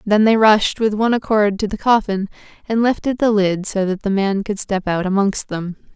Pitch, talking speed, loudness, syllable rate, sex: 205 Hz, 220 wpm, -17 LUFS, 5.1 syllables/s, female